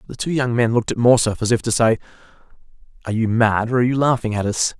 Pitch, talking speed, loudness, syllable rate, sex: 115 Hz, 240 wpm, -18 LUFS, 7.1 syllables/s, male